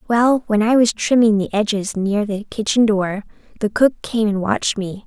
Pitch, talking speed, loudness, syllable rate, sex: 215 Hz, 200 wpm, -18 LUFS, 4.8 syllables/s, female